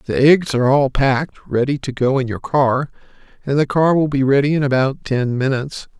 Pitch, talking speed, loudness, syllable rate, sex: 135 Hz, 210 wpm, -17 LUFS, 5.4 syllables/s, female